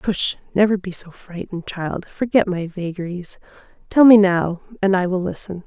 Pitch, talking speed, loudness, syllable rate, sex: 190 Hz, 160 wpm, -19 LUFS, 4.9 syllables/s, female